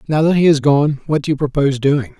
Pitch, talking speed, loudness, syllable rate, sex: 145 Hz, 275 wpm, -15 LUFS, 6.2 syllables/s, male